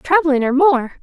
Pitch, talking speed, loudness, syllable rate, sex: 295 Hz, 175 wpm, -15 LUFS, 4.4 syllables/s, female